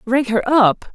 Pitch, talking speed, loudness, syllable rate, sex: 245 Hz, 190 wpm, -16 LUFS, 3.8 syllables/s, female